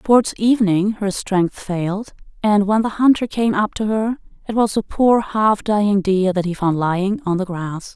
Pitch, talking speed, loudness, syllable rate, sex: 205 Hz, 205 wpm, -18 LUFS, 4.7 syllables/s, female